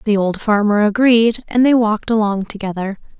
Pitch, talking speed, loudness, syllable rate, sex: 215 Hz, 170 wpm, -16 LUFS, 5.1 syllables/s, female